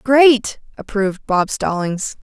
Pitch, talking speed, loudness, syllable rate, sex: 220 Hz, 105 wpm, -17 LUFS, 3.6 syllables/s, female